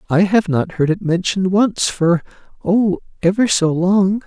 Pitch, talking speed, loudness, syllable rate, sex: 185 Hz, 155 wpm, -16 LUFS, 4.3 syllables/s, male